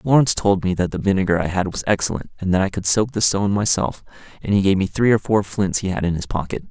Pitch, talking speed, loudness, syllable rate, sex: 95 Hz, 275 wpm, -19 LUFS, 6.6 syllables/s, male